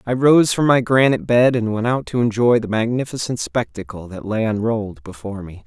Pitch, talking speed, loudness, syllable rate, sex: 115 Hz, 200 wpm, -18 LUFS, 5.6 syllables/s, male